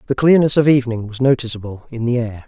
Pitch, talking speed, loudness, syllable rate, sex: 125 Hz, 220 wpm, -16 LUFS, 6.6 syllables/s, male